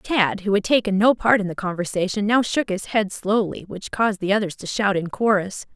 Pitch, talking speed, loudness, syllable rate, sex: 200 Hz, 230 wpm, -21 LUFS, 5.3 syllables/s, female